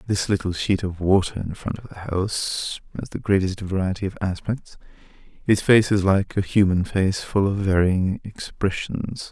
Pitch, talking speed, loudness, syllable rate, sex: 95 Hz, 175 wpm, -22 LUFS, 4.7 syllables/s, male